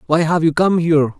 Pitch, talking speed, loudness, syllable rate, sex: 160 Hz, 250 wpm, -15 LUFS, 5.9 syllables/s, male